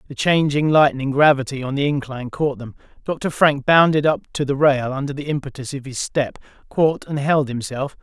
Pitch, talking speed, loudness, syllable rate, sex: 140 Hz, 195 wpm, -19 LUFS, 5.3 syllables/s, male